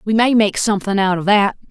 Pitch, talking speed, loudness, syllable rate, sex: 205 Hz, 245 wpm, -16 LUFS, 6.0 syllables/s, female